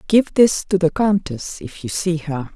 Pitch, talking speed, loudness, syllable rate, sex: 175 Hz, 210 wpm, -19 LUFS, 4.2 syllables/s, female